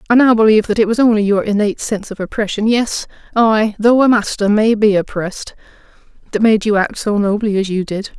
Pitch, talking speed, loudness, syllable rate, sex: 210 Hz, 200 wpm, -15 LUFS, 8.5 syllables/s, female